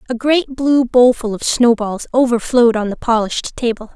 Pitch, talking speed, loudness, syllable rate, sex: 240 Hz, 165 wpm, -15 LUFS, 5.1 syllables/s, female